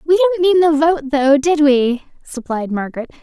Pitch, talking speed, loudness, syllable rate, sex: 295 Hz, 185 wpm, -15 LUFS, 5.0 syllables/s, female